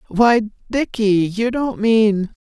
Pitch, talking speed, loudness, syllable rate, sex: 215 Hz, 125 wpm, -17 LUFS, 2.8 syllables/s, female